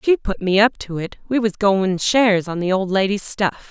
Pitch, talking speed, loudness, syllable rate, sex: 200 Hz, 245 wpm, -19 LUFS, 5.0 syllables/s, female